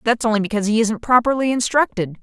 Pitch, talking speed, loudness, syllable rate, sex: 225 Hz, 190 wpm, -18 LUFS, 6.7 syllables/s, female